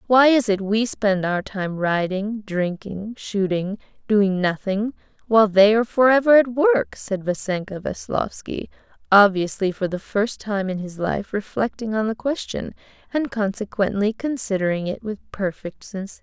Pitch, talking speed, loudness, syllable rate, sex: 210 Hz, 150 wpm, -21 LUFS, 4.6 syllables/s, female